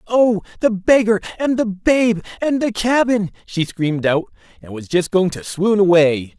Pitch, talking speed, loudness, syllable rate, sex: 195 Hz, 180 wpm, -17 LUFS, 4.5 syllables/s, male